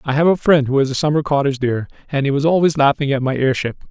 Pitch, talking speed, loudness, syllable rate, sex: 140 Hz, 275 wpm, -17 LUFS, 7.2 syllables/s, male